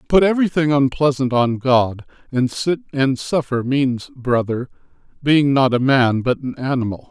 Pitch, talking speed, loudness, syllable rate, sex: 135 Hz, 160 wpm, -18 LUFS, 4.6 syllables/s, male